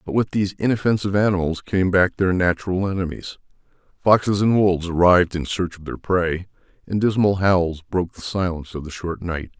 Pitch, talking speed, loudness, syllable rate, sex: 90 Hz, 180 wpm, -20 LUFS, 5.8 syllables/s, male